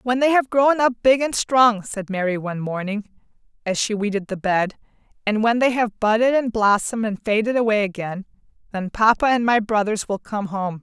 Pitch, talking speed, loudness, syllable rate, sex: 220 Hz, 200 wpm, -20 LUFS, 5.2 syllables/s, female